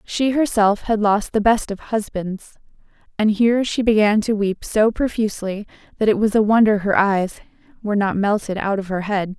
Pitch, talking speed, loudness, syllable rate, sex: 210 Hz, 190 wpm, -19 LUFS, 5.1 syllables/s, female